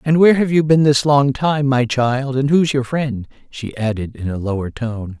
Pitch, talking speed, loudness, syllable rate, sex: 130 Hz, 230 wpm, -17 LUFS, 4.7 syllables/s, male